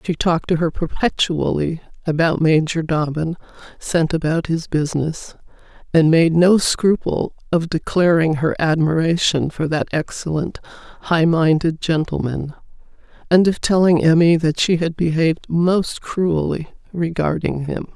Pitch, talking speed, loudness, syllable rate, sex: 165 Hz, 125 wpm, -18 LUFS, 4.5 syllables/s, female